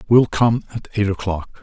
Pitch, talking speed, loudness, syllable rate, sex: 105 Hz, 185 wpm, -19 LUFS, 4.8 syllables/s, male